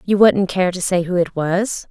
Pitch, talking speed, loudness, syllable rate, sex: 185 Hz, 250 wpm, -17 LUFS, 4.4 syllables/s, female